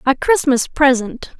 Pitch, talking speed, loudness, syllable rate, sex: 270 Hz, 130 wpm, -15 LUFS, 4.1 syllables/s, female